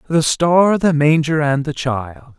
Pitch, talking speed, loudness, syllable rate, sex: 150 Hz, 175 wpm, -16 LUFS, 3.7 syllables/s, male